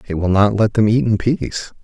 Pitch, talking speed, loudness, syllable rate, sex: 105 Hz, 260 wpm, -16 LUFS, 5.5 syllables/s, male